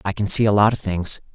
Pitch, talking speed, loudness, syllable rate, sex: 100 Hz, 310 wpm, -19 LUFS, 6.1 syllables/s, male